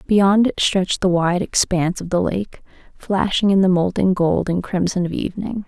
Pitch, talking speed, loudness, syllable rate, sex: 185 Hz, 190 wpm, -18 LUFS, 5.0 syllables/s, female